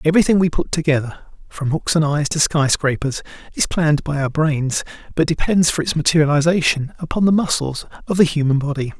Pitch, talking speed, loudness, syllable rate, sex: 155 Hz, 165 wpm, -18 LUFS, 5.8 syllables/s, male